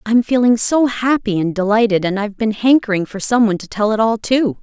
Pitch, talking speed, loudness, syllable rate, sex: 220 Hz, 220 wpm, -16 LUFS, 5.8 syllables/s, female